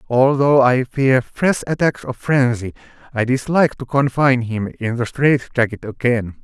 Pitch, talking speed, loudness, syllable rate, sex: 130 Hz, 160 wpm, -17 LUFS, 4.6 syllables/s, male